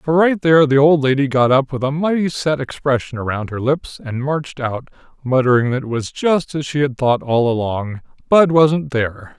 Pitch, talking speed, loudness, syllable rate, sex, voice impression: 140 Hz, 205 wpm, -17 LUFS, 5.1 syllables/s, male, very masculine, very adult-like, very middle-aged, thick, slightly tensed, powerful, weak, bright, slightly soft, clear, cool, intellectual, slightly refreshing, sincere, calm, mature, friendly, reassuring, slightly unique, slightly elegant, wild, sweet, slightly lively, kind, slightly modest, slightly light